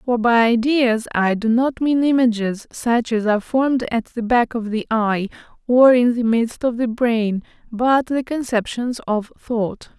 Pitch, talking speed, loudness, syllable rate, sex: 235 Hz, 180 wpm, -19 LUFS, 4.2 syllables/s, female